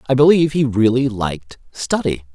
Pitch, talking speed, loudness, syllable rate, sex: 125 Hz, 155 wpm, -17 LUFS, 5.3 syllables/s, male